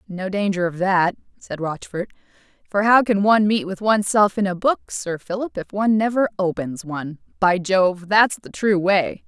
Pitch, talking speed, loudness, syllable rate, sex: 195 Hz, 180 wpm, -20 LUFS, 4.9 syllables/s, female